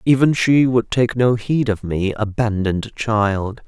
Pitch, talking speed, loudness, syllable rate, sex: 115 Hz, 165 wpm, -18 LUFS, 4.0 syllables/s, male